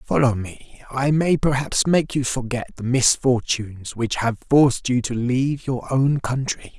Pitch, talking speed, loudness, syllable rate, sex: 130 Hz, 170 wpm, -21 LUFS, 4.3 syllables/s, male